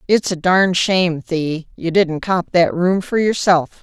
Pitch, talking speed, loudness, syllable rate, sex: 175 Hz, 190 wpm, -17 LUFS, 4.4 syllables/s, female